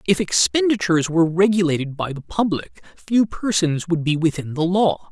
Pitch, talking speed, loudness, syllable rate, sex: 175 Hz, 165 wpm, -20 LUFS, 5.3 syllables/s, male